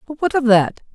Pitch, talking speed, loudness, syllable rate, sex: 250 Hz, 255 wpm, -17 LUFS, 5.5 syllables/s, female